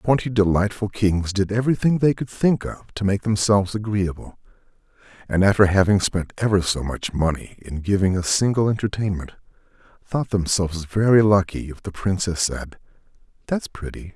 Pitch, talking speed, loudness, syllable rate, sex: 100 Hz, 155 wpm, -21 LUFS, 5.2 syllables/s, male